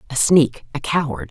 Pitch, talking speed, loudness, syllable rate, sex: 135 Hz, 185 wpm, -18 LUFS, 4.9 syllables/s, female